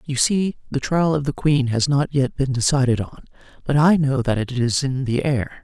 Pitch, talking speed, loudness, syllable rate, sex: 140 Hz, 235 wpm, -20 LUFS, 4.9 syllables/s, female